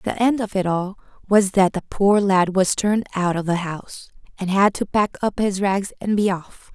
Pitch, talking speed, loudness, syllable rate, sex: 195 Hz, 230 wpm, -20 LUFS, 4.8 syllables/s, female